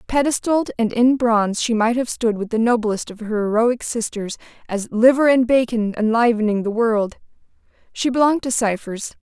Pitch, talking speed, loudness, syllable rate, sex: 230 Hz, 170 wpm, -19 LUFS, 5.2 syllables/s, female